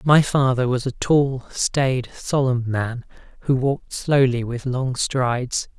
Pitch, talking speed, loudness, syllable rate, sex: 130 Hz, 145 wpm, -21 LUFS, 3.7 syllables/s, male